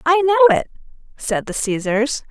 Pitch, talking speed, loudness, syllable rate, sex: 280 Hz, 155 wpm, -17 LUFS, 4.2 syllables/s, female